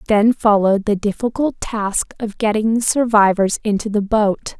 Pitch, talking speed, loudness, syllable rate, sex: 215 Hz, 155 wpm, -17 LUFS, 4.6 syllables/s, female